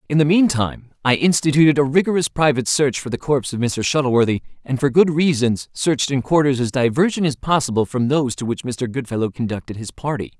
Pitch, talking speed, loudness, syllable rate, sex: 135 Hz, 200 wpm, -19 LUFS, 6.2 syllables/s, male